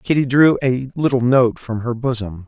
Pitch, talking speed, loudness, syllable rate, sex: 125 Hz, 195 wpm, -17 LUFS, 4.9 syllables/s, male